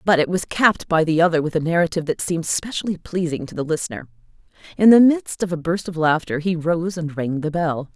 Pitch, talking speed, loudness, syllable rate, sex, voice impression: 170 Hz, 235 wpm, -20 LUFS, 6.0 syllables/s, female, feminine, adult-like, tensed, powerful, clear, fluent, intellectual, lively, strict, sharp